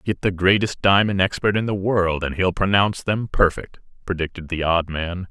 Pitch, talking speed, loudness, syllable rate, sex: 95 Hz, 190 wpm, -20 LUFS, 5.1 syllables/s, male